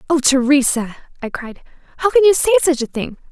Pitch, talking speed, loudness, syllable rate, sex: 290 Hz, 200 wpm, -15 LUFS, 5.8 syllables/s, female